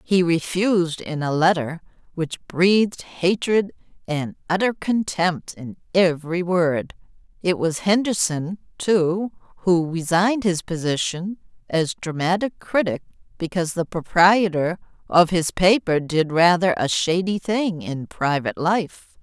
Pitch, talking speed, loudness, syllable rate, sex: 175 Hz, 120 wpm, -21 LUFS, 4.1 syllables/s, female